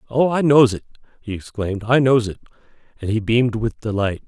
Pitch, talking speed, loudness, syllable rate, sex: 115 Hz, 195 wpm, -18 LUFS, 6.0 syllables/s, male